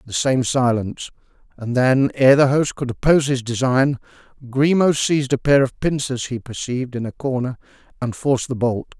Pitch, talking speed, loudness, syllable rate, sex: 130 Hz, 180 wpm, -19 LUFS, 5.3 syllables/s, male